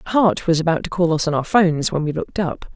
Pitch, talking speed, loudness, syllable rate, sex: 170 Hz, 285 wpm, -19 LUFS, 6.3 syllables/s, female